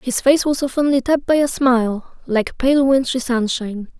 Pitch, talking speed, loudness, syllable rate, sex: 255 Hz, 195 wpm, -17 LUFS, 4.9 syllables/s, female